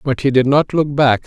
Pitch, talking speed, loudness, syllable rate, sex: 135 Hz, 285 wpm, -15 LUFS, 5.3 syllables/s, male